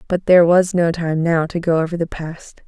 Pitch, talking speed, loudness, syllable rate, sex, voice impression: 170 Hz, 245 wpm, -17 LUFS, 5.2 syllables/s, female, feminine, adult-like, soft, fluent, slightly intellectual, calm, friendly, elegant, kind, slightly modest